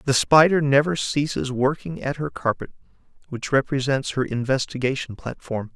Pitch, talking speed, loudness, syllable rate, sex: 135 Hz, 135 wpm, -22 LUFS, 5.0 syllables/s, male